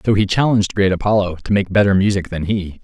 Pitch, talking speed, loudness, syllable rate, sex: 100 Hz, 235 wpm, -17 LUFS, 6.4 syllables/s, male